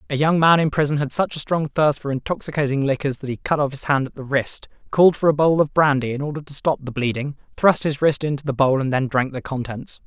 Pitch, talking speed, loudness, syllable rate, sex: 145 Hz, 270 wpm, -20 LUFS, 6.1 syllables/s, male